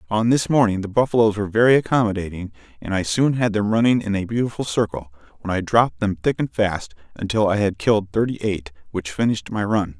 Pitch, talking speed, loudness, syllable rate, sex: 105 Hz, 210 wpm, -20 LUFS, 6.2 syllables/s, male